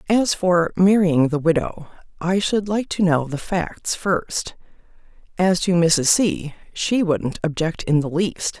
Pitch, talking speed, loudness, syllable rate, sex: 175 Hz, 160 wpm, -20 LUFS, 3.7 syllables/s, female